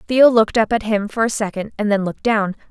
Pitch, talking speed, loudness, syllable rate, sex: 215 Hz, 265 wpm, -18 LUFS, 6.3 syllables/s, female